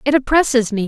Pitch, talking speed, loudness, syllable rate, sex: 250 Hz, 205 wpm, -15 LUFS, 6.1 syllables/s, female